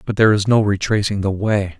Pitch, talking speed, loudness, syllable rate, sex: 100 Hz, 235 wpm, -17 LUFS, 6.2 syllables/s, male